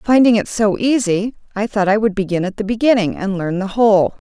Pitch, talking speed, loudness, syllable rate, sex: 210 Hz, 225 wpm, -16 LUFS, 5.6 syllables/s, female